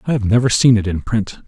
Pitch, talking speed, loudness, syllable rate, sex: 110 Hz, 285 wpm, -16 LUFS, 6.0 syllables/s, male